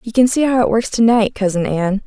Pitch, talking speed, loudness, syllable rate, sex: 220 Hz, 290 wpm, -15 LUFS, 5.6 syllables/s, female